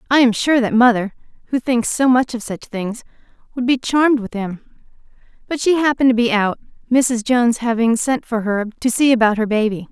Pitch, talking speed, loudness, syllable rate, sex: 235 Hz, 205 wpm, -17 LUFS, 5.6 syllables/s, female